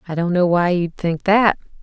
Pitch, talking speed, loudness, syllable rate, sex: 180 Hz, 230 wpm, -18 LUFS, 4.8 syllables/s, female